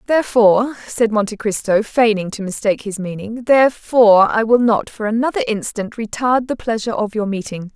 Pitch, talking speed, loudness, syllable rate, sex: 220 Hz, 160 wpm, -17 LUFS, 5.6 syllables/s, female